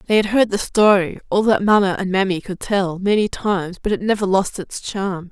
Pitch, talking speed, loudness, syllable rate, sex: 195 Hz, 205 wpm, -18 LUFS, 5.2 syllables/s, female